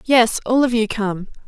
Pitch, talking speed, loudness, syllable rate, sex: 230 Hz, 205 wpm, -18 LUFS, 4.3 syllables/s, female